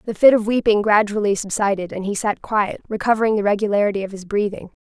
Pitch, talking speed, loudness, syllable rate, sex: 205 Hz, 200 wpm, -19 LUFS, 6.4 syllables/s, female